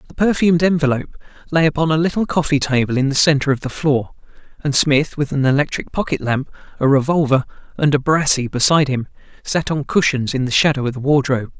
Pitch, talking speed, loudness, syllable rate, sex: 145 Hz, 195 wpm, -17 LUFS, 6.2 syllables/s, male